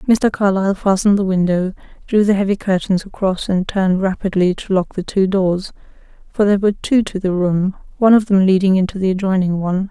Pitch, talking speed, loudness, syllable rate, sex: 190 Hz, 195 wpm, -16 LUFS, 5.9 syllables/s, female